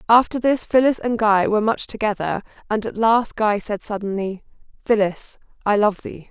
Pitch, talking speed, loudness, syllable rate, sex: 215 Hz, 170 wpm, -20 LUFS, 5.0 syllables/s, female